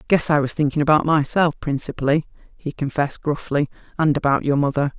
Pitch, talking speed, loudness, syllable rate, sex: 145 Hz, 170 wpm, -20 LUFS, 6.0 syllables/s, female